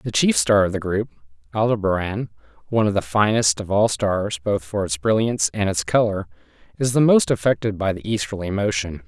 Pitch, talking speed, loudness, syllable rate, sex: 100 Hz, 190 wpm, -21 LUFS, 5.5 syllables/s, male